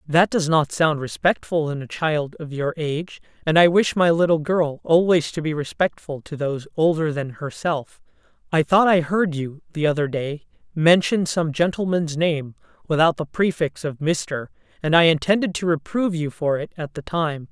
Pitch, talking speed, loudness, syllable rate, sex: 160 Hz, 185 wpm, -21 LUFS, 4.8 syllables/s, female